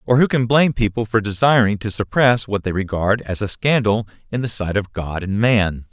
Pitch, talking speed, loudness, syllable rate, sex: 110 Hz, 225 wpm, -18 LUFS, 5.2 syllables/s, male